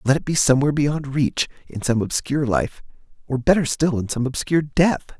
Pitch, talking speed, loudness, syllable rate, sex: 140 Hz, 185 wpm, -21 LUFS, 5.6 syllables/s, male